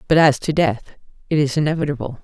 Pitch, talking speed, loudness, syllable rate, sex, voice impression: 145 Hz, 190 wpm, -19 LUFS, 6.3 syllables/s, female, feminine, adult-like, slightly intellectual